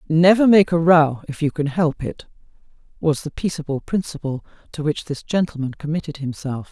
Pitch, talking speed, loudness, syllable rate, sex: 155 Hz, 170 wpm, -20 LUFS, 5.3 syllables/s, female